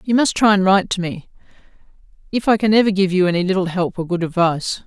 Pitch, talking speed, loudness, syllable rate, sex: 190 Hz, 235 wpm, -17 LUFS, 6.7 syllables/s, female